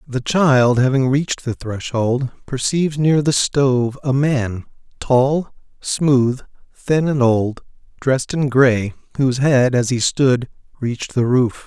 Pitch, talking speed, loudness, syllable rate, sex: 130 Hz, 145 wpm, -17 LUFS, 3.9 syllables/s, male